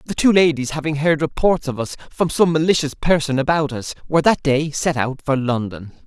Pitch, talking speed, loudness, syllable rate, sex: 150 Hz, 210 wpm, -19 LUFS, 5.4 syllables/s, male